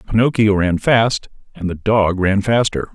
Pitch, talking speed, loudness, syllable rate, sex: 105 Hz, 165 wpm, -16 LUFS, 4.5 syllables/s, male